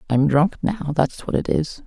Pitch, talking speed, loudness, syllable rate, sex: 155 Hz, 225 wpm, -21 LUFS, 4.4 syllables/s, female